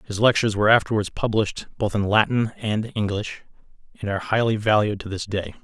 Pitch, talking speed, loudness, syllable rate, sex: 105 Hz, 180 wpm, -22 LUFS, 6.1 syllables/s, male